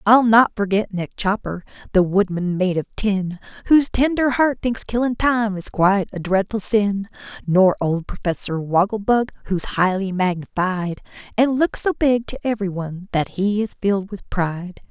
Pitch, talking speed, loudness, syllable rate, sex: 200 Hz, 165 wpm, -20 LUFS, 4.6 syllables/s, female